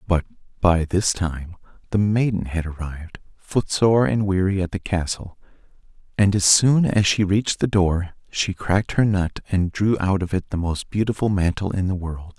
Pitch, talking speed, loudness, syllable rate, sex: 95 Hz, 185 wpm, -21 LUFS, 4.9 syllables/s, male